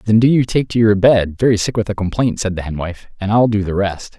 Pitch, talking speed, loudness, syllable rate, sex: 105 Hz, 300 wpm, -16 LUFS, 5.9 syllables/s, male